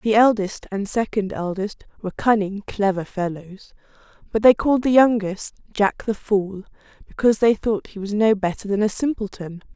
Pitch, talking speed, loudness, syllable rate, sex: 205 Hz, 165 wpm, -21 LUFS, 5.0 syllables/s, female